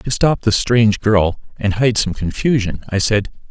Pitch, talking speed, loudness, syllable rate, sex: 110 Hz, 190 wpm, -17 LUFS, 4.5 syllables/s, male